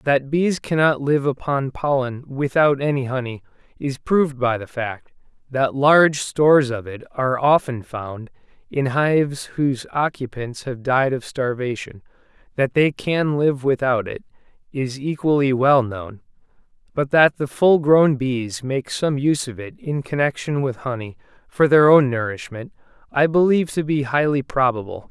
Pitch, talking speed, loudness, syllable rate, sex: 135 Hz, 155 wpm, -20 LUFS, 4.5 syllables/s, male